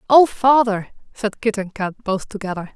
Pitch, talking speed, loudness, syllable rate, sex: 215 Hz, 175 wpm, -19 LUFS, 4.8 syllables/s, female